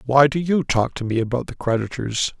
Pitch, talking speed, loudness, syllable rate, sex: 130 Hz, 225 wpm, -21 LUFS, 5.4 syllables/s, male